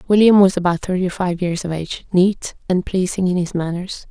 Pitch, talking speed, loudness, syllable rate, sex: 180 Hz, 205 wpm, -18 LUFS, 5.4 syllables/s, female